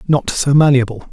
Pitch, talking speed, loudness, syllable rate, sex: 135 Hz, 160 wpm, -13 LUFS, 5.3 syllables/s, male